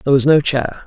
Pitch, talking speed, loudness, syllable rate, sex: 140 Hz, 280 wpm, -15 LUFS, 6.0 syllables/s, male